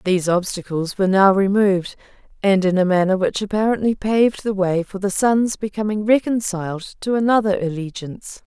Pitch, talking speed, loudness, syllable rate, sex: 195 Hz, 155 wpm, -19 LUFS, 5.6 syllables/s, female